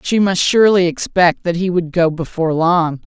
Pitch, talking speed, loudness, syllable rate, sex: 175 Hz, 195 wpm, -15 LUFS, 5.1 syllables/s, female